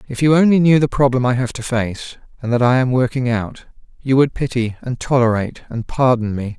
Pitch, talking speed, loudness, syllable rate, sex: 125 Hz, 220 wpm, -17 LUFS, 5.7 syllables/s, male